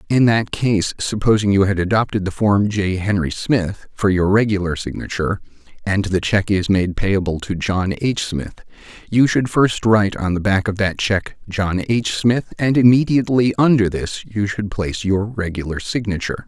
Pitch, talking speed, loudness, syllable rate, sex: 100 Hz, 180 wpm, -18 LUFS, 4.8 syllables/s, male